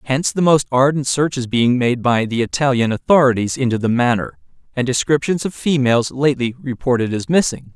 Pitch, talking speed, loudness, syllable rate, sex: 130 Hz, 180 wpm, -17 LUFS, 5.7 syllables/s, male